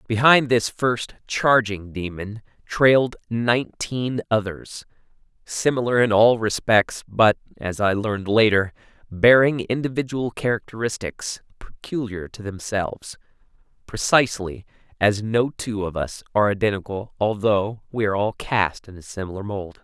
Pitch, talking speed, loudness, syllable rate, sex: 110 Hz, 120 wpm, -21 LUFS, 4.5 syllables/s, male